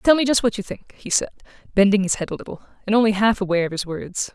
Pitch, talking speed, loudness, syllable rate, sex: 205 Hz, 275 wpm, -20 LUFS, 6.9 syllables/s, female